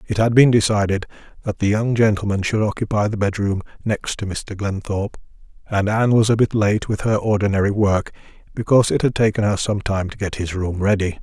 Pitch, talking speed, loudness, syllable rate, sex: 105 Hz, 205 wpm, -19 LUFS, 5.6 syllables/s, male